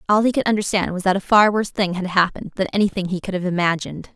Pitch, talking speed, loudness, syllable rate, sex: 190 Hz, 260 wpm, -19 LUFS, 7.2 syllables/s, female